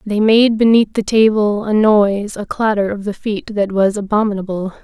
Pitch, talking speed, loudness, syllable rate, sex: 210 Hz, 185 wpm, -15 LUFS, 4.9 syllables/s, female